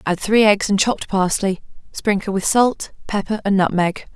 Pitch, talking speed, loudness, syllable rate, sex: 200 Hz, 175 wpm, -18 LUFS, 4.8 syllables/s, female